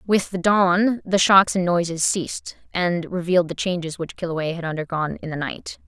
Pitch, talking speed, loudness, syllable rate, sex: 175 Hz, 195 wpm, -21 LUFS, 5.1 syllables/s, female